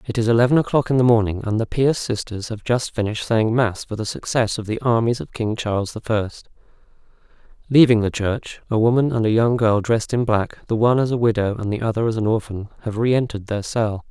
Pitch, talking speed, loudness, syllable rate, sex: 115 Hz, 230 wpm, -20 LUFS, 6.0 syllables/s, male